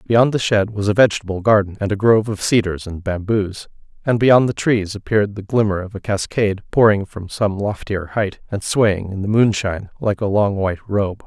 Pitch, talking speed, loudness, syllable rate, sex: 105 Hz, 210 wpm, -18 LUFS, 5.3 syllables/s, male